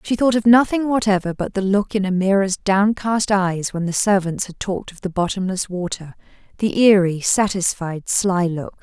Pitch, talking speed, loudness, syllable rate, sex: 195 Hz, 170 wpm, -19 LUFS, 4.8 syllables/s, female